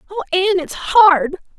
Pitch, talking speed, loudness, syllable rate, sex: 360 Hz, 150 wpm, -15 LUFS, 7.1 syllables/s, female